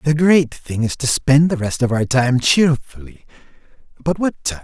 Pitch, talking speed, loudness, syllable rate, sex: 140 Hz, 195 wpm, -17 LUFS, 4.6 syllables/s, male